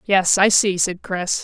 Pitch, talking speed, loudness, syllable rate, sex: 190 Hz, 210 wpm, -17 LUFS, 3.8 syllables/s, female